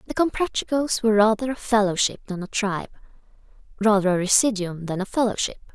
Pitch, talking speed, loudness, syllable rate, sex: 215 Hz, 155 wpm, -22 LUFS, 6.3 syllables/s, female